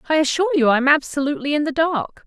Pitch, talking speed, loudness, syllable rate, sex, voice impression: 290 Hz, 240 wpm, -19 LUFS, 7.4 syllables/s, female, very feminine, very adult-like, very middle-aged, slightly thin, tensed, powerful, dark, very hard, slightly muffled, very fluent, slightly raspy, cool, intellectual, slightly refreshing, slightly sincere, slightly calm, slightly friendly, slightly reassuring, unique, slightly elegant, wild, very lively, very strict, intense, sharp, light